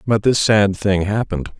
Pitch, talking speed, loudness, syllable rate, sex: 100 Hz, 190 wpm, -17 LUFS, 4.9 syllables/s, male